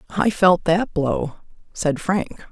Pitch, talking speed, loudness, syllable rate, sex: 175 Hz, 145 wpm, -20 LUFS, 3.4 syllables/s, female